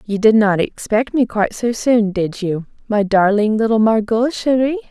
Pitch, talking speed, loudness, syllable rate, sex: 220 Hz, 185 wpm, -16 LUFS, 4.7 syllables/s, female